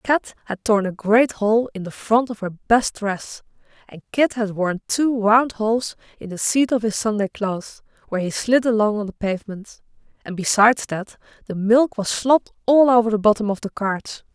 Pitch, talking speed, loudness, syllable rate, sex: 215 Hz, 200 wpm, -20 LUFS, 5.0 syllables/s, female